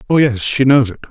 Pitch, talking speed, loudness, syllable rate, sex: 125 Hz, 270 wpm, -13 LUFS, 6.0 syllables/s, male